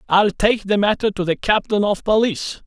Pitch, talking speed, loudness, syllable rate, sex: 205 Hz, 205 wpm, -18 LUFS, 5.2 syllables/s, male